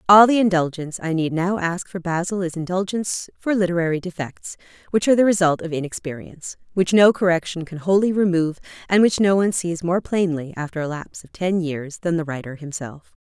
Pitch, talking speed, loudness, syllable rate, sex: 175 Hz, 195 wpm, -21 LUFS, 5.9 syllables/s, female